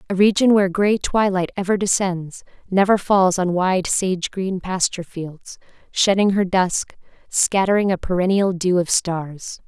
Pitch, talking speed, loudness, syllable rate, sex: 185 Hz, 135 wpm, -19 LUFS, 4.5 syllables/s, female